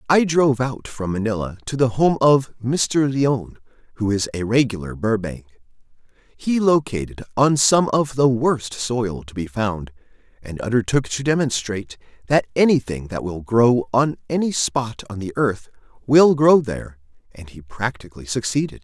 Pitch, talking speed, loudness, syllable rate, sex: 120 Hz, 155 wpm, -20 LUFS, 4.6 syllables/s, male